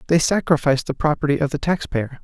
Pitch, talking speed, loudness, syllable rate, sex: 150 Hz, 215 wpm, -20 LUFS, 6.4 syllables/s, male